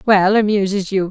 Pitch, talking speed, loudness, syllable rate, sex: 195 Hz, 165 wpm, -16 LUFS, 5.1 syllables/s, female